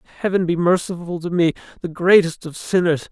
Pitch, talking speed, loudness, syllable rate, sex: 175 Hz, 175 wpm, -19 LUFS, 5.7 syllables/s, male